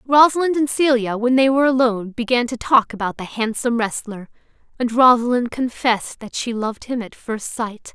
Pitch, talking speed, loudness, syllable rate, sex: 240 Hz, 180 wpm, -19 LUFS, 5.4 syllables/s, female